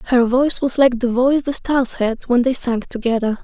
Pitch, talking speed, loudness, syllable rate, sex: 245 Hz, 225 wpm, -18 LUFS, 5.6 syllables/s, female